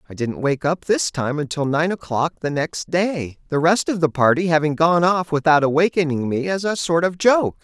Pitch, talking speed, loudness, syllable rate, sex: 160 Hz, 220 wpm, -19 LUFS, 5.0 syllables/s, male